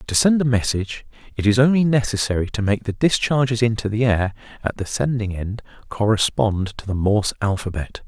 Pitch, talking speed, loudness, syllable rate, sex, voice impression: 110 Hz, 180 wpm, -20 LUFS, 5.6 syllables/s, male, masculine, adult-like, fluent, slightly cool, refreshing, slightly sincere